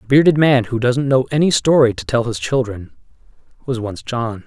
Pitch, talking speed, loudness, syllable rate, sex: 125 Hz, 200 wpm, -17 LUFS, 5.1 syllables/s, male